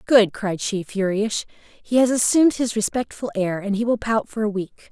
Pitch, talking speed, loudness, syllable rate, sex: 215 Hz, 195 wpm, -21 LUFS, 4.9 syllables/s, female